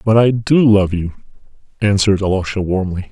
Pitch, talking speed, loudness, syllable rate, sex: 100 Hz, 155 wpm, -15 LUFS, 5.7 syllables/s, male